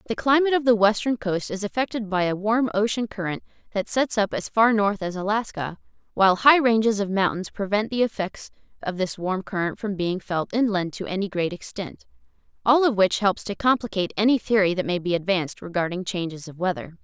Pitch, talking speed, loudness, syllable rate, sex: 205 Hz, 200 wpm, -23 LUFS, 5.7 syllables/s, female